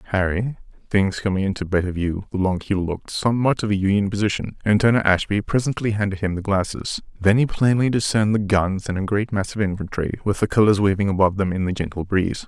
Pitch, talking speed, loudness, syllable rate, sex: 100 Hz, 220 wpm, -21 LUFS, 6.2 syllables/s, male